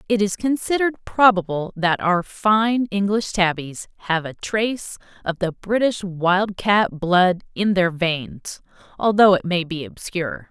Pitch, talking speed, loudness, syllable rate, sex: 190 Hz, 150 wpm, -20 LUFS, 4.1 syllables/s, female